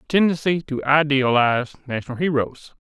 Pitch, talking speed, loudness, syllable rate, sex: 140 Hz, 125 wpm, -20 LUFS, 5.4 syllables/s, male